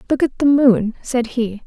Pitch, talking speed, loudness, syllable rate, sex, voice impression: 245 Hz, 215 wpm, -17 LUFS, 4.4 syllables/s, female, very feminine, slightly young, slightly soft, slightly fluent, slightly cute, kind